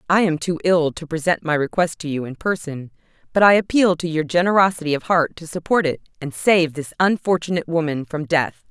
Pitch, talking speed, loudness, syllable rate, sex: 165 Hz, 205 wpm, -19 LUFS, 5.6 syllables/s, female